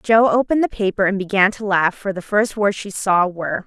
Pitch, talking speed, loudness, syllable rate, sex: 200 Hz, 245 wpm, -18 LUFS, 5.5 syllables/s, female